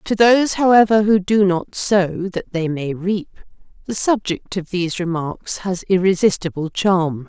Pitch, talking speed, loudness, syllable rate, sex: 190 Hz, 155 wpm, -18 LUFS, 4.5 syllables/s, female